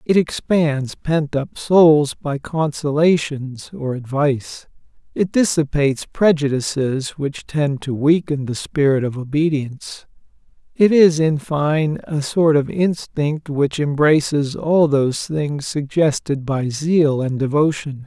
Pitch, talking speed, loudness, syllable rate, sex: 150 Hz, 125 wpm, -18 LUFS, 3.8 syllables/s, male